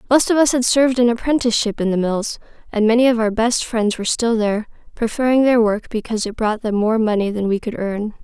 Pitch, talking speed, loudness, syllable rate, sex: 225 Hz, 235 wpm, -18 LUFS, 6.1 syllables/s, female